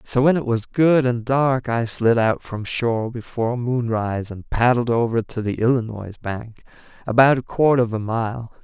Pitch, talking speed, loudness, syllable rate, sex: 120 Hz, 190 wpm, -20 LUFS, 4.7 syllables/s, male